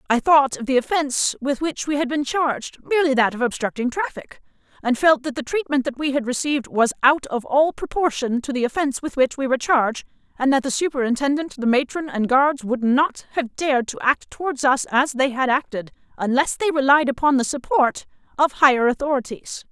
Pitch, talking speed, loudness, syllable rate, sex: 270 Hz, 200 wpm, -20 LUFS, 5.8 syllables/s, female